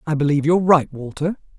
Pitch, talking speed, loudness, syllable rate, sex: 155 Hz, 190 wpm, -18 LUFS, 7.0 syllables/s, female